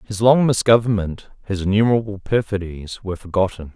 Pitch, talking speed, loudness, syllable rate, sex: 100 Hz, 130 wpm, -19 LUFS, 5.9 syllables/s, male